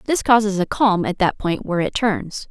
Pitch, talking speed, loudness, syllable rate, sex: 200 Hz, 240 wpm, -19 LUFS, 4.9 syllables/s, female